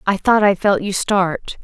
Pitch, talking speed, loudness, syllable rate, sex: 195 Hz, 220 wpm, -16 LUFS, 4.0 syllables/s, female